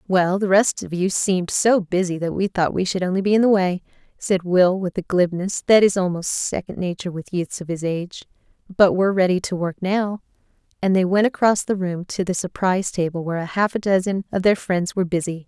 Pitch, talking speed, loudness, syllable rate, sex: 185 Hz, 225 wpm, -20 LUFS, 5.6 syllables/s, female